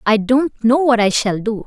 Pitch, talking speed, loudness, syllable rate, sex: 235 Hz, 250 wpm, -16 LUFS, 4.5 syllables/s, female